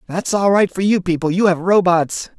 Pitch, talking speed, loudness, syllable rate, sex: 185 Hz, 225 wpm, -16 LUFS, 5.1 syllables/s, male